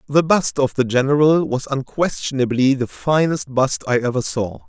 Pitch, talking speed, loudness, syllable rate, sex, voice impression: 135 Hz, 165 wpm, -18 LUFS, 4.8 syllables/s, male, masculine, adult-like, tensed, powerful, bright, clear, slightly raspy, intellectual, friendly, unique, lively